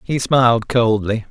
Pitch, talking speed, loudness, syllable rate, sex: 115 Hz, 140 wpm, -16 LUFS, 4.2 syllables/s, male